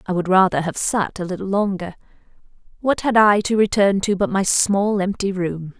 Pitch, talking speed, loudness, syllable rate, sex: 195 Hz, 195 wpm, -19 LUFS, 5.0 syllables/s, female